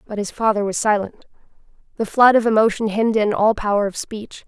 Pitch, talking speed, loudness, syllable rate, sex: 215 Hz, 200 wpm, -18 LUFS, 5.8 syllables/s, female